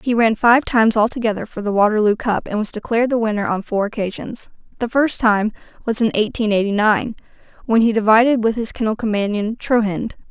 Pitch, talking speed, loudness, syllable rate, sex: 220 Hz, 190 wpm, -18 LUFS, 5.9 syllables/s, female